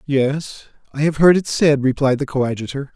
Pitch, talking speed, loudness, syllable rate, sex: 140 Hz, 180 wpm, -18 LUFS, 5.3 syllables/s, male